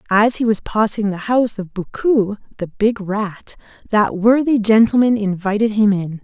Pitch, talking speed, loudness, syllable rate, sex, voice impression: 215 Hz, 165 wpm, -17 LUFS, 4.6 syllables/s, female, feminine, adult-like, tensed, powerful, bright, clear, fluent, intellectual, friendly, elegant, lively